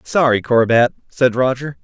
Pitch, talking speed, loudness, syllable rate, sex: 120 Hz, 130 wpm, -16 LUFS, 4.6 syllables/s, male